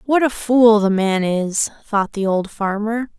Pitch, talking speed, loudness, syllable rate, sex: 215 Hz, 190 wpm, -18 LUFS, 3.8 syllables/s, female